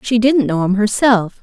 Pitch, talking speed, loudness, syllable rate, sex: 215 Hz, 210 wpm, -14 LUFS, 4.5 syllables/s, female